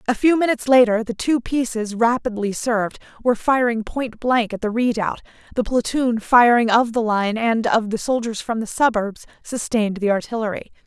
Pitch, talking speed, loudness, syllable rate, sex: 230 Hz, 175 wpm, -20 LUFS, 5.2 syllables/s, female